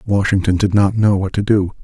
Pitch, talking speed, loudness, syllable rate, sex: 100 Hz, 230 wpm, -16 LUFS, 5.4 syllables/s, male